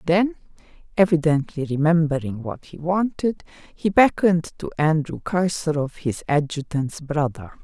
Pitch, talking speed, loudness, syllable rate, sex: 160 Hz, 110 wpm, -22 LUFS, 4.6 syllables/s, female